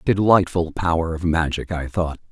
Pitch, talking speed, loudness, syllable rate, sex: 85 Hz, 155 wpm, -21 LUFS, 4.7 syllables/s, male